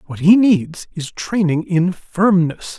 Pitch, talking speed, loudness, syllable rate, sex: 180 Hz, 150 wpm, -16 LUFS, 3.5 syllables/s, male